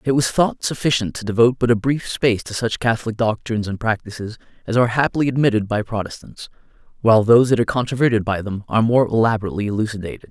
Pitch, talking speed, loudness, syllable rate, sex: 115 Hz, 190 wpm, -19 LUFS, 7.1 syllables/s, male